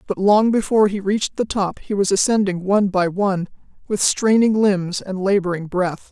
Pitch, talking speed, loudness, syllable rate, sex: 195 Hz, 185 wpm, -19 LUFS, 5.2 syllables/s, female